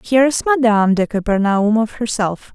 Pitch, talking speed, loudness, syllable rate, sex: 220 Hz, 140 wpm, -16 LUFS, 5.3 syllables/s, female